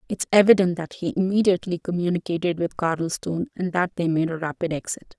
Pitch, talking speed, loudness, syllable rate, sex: 175 Hz, 175 wpm, -23 LUFS, 6.3 syllables/s, female